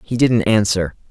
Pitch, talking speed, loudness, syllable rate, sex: 110 Hz, 160 wpm, -16 LUFS, 4.6 syllables/s, male